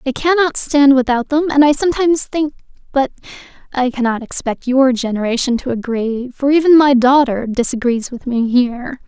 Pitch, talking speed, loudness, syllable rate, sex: 265 Hz, 160 wpm, -15 LUFS, 5.2 syllables/s, female